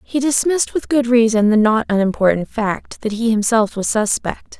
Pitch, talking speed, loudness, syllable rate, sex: 230 Hz, 185 wpm, -17 LUFS, 4.9 syllables/s, female